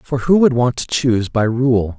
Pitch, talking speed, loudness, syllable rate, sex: 125 Hz, 240 wpm, -16 LUFS, 4.8 syllables/s, male